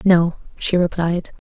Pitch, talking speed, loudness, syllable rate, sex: 175 Hz, 120 wpm, -20 LUFS, 3.7 syllables/s, female